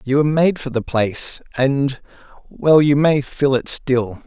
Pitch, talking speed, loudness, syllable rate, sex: 135 Hz, 170 wpm, -18 LUFS, 4.3 syllables/s, male